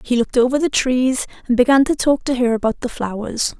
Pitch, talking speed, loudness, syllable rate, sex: 250 Hz, 235 wpm, -18 LUFS, 5.9 syllables/s, female